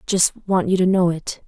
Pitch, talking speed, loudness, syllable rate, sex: 180 Hz, 285 wpm, -19 LUFS, 5.8 syllables/s, female